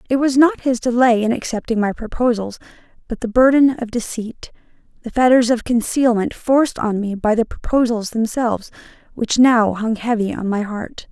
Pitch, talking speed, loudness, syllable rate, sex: 235 Hz, 175 wpm, -17 LUFS, 5.1 syllables/s, female